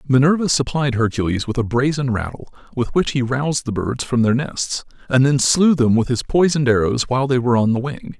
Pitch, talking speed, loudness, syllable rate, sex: 130 Hz, 220 wpm, -18 LUFS, 5.8 syllables/s, male